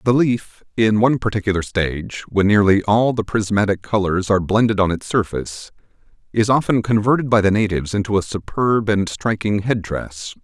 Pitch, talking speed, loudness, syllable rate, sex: 105 Hz, 175 wpm, -18 LUFS, 5.4 syllables/s, male